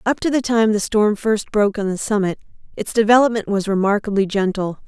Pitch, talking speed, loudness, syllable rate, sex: 210 Hz, 195 wpm, -18 LUFS, 5.8 syllables/s, female